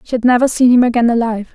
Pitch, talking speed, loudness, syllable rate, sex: 240 Hz, 270 wpm, -13 LUFS, 7.6 syllables/s, female